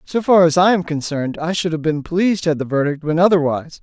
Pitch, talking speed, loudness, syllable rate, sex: 165 Hz, 250 wpm, -17 LUFS, 6.2 syllables/s, male